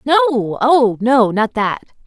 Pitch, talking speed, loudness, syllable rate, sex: 240 Hz, 145 wpm, -15 LUFS, 3.0 syllables/s, female